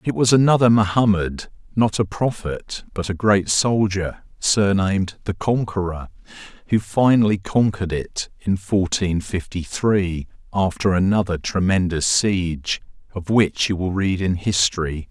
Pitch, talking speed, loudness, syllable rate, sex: 100 Hz, 130 wpm, -20 LUFS, 4.3 syllables/s, male